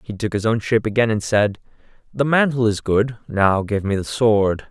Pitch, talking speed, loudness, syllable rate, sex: 110 Hz, 215 wpm, -19 LUFS, 5.1 syllables/s, male